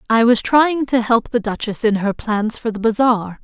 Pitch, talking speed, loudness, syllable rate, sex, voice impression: 230 Hz, 225 wpm, -17 LUFS, 4.6 syllables/s, female, feminine, adult-like, powerful, intellectual, sharp